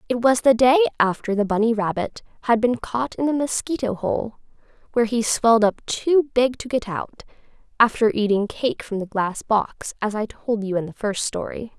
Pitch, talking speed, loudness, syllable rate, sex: 230 Hz, 200 wpm, -21 LUFS, 5.0 syllables/s, female